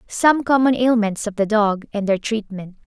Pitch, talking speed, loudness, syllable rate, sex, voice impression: 220 Hz, 190 wpm, -19 LUFS, 4.6 syllables/s, female, feminine, young, tensed, powerful, bright, slightly soft, slightly halting, cute, slightly refreshing, friendly, slightly sweet, lively